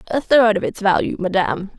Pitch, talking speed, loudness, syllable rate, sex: 200 Hz, 200 wpm, -17 LUFS, 5.8 syllables/s, female